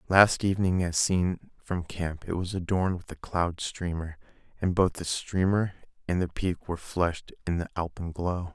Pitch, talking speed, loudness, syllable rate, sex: 90 Hz, 175 wpm, -28 LUFS, 4.8 syllables/s, male